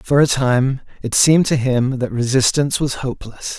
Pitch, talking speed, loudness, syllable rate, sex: 130 Hz, 185 wpm, -17 LUFS, 5.1 syllables/s, male